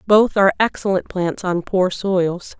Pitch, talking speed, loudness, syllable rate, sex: 190 Hz, 160 wpm, -18 LUFS, 4.2 syllables/s, female